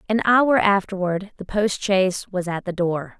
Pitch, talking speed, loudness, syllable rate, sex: 195 Hz, 190 wpm, -21 LUFS, 4.6 syllables/s, female